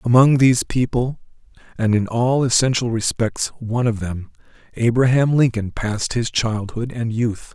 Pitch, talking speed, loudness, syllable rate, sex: 120 Hz, 145 wpm, -19 LUFS, 4.7 syllables/s, male